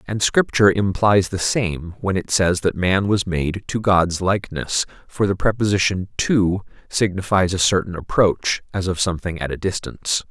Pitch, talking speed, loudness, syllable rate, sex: 95 Hz, 170 wpm, -20 LUFS, 4.8 syllables/s, male